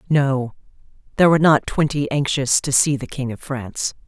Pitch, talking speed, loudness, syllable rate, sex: 140 Hz, 175 wpm, -19 LUFS, 5.4 syllables/s, female